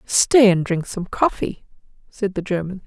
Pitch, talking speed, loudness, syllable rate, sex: 195 Hz, 165 wpm, -19 LUFS, 4.3 syllables/s, female